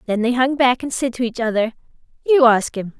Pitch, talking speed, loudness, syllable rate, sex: 245 Hz, 240 wpm, -18 LUFS, 5.7 syllables/s, female